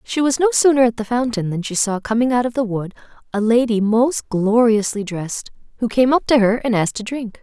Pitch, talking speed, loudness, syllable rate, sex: 230 Hz, 235 wpm, -18 LUFS, 5.6 syllables/s, female